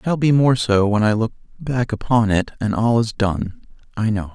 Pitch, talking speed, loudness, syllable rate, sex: 110 Hz, 235 wpm, -19 LUFS, 4.9 syllables/s, male